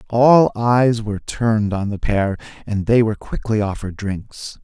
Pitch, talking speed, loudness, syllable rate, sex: 110 Hz, 170 wpm, -18 LUFS, 4.6 syllables/s, male